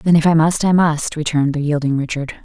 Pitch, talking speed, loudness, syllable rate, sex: 155 Hz, 245 wpm, -16 LUFS, 5.9 syllables/s, female